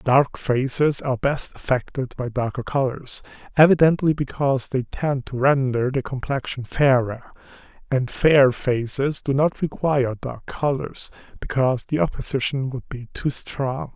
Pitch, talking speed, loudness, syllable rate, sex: 135 Hz, 140 wpm, -22 LUFS, 4.5 syllables/s, male